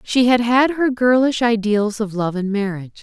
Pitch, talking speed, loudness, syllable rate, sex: 225 Hz, 200 wpm, -17 LUFS, 4.8 syllables/s, female